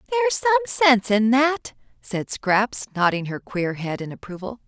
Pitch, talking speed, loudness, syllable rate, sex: 240 Hz, 165 wpm, -21 LUFS, 6.1 syllables/s, female